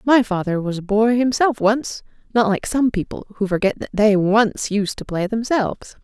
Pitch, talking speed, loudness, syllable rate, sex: 215 Hz, 200 wpm, -19 LUFS, 4.8 syllables/s, female